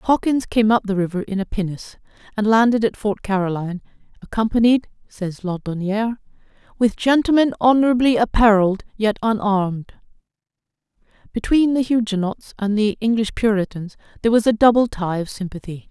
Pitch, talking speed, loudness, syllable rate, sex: 215 Hz, 135 wpm, -19 LUFS, 5.6 syllables/s, female